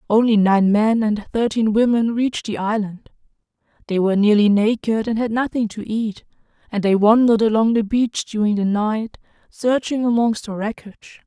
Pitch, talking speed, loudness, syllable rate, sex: 220 Hz, 165 wpm, -18 LUFS, 5.0 syllables/s, female